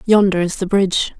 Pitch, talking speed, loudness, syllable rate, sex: 190 Hz, 200 wpm, -16 LUFS, 5.7 syllables/s, female